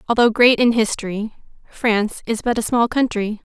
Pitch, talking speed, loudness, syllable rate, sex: 225 Hz, 170 wpm, -18 LUFS, 5.2 syllables/s, female